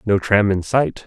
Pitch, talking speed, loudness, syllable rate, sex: 100 Hz, 225 wpm, -17 LUFS, 4.2 syllables/s, male